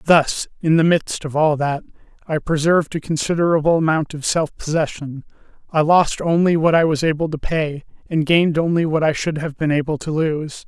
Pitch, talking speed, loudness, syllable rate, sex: 155 Hz, 195 wpm, -18 LUFS, 5.2 syllables/s, male